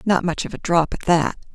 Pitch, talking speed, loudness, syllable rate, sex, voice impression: 170 Hz, 270 wpm, -21 LUFS, 5.4 syllables/s, female, feminine, adult-like, slightly fluent, calm, elegant